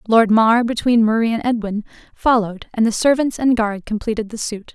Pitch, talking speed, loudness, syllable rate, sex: 225 Hz, 190 wpm, -18 LUFS, 5.4 syllables/s, female